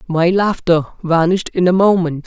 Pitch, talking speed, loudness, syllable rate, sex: 175 Hz, 160 wpm, -15 LUFS, 5.1 syllables/s, male